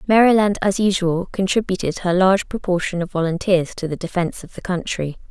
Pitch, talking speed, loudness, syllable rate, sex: 185 Hz, 170 wpm, -19 LUFS, 5.8 syllables/s, female